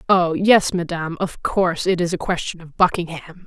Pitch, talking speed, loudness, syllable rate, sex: 175 Hz, 190 wpm, -20 LUFS, 5.2 syllables/s, female